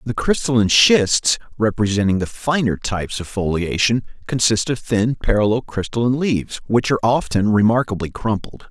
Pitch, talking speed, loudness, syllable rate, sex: 115 Hz, 140 wpm, -18 LUFS, 5.4 syllables/s, male